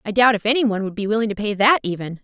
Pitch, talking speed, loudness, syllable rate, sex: 215 Hz, 320 wpm, -19 LUFS, 7.7 syllables/s, female